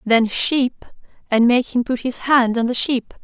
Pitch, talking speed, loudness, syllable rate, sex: 245 Hz, 205 wpm, -18 LUFS, 4.0 syllables/s, female